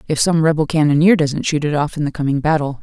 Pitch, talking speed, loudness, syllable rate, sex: 150 Hz, 255 wpm, -16 LUFS, 6.4 syllables/s, female